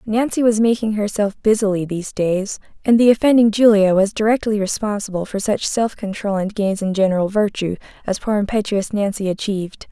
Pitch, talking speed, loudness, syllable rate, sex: 205 Hz, 170 wpm, -18 LUFS, 5.6 syllables/s, female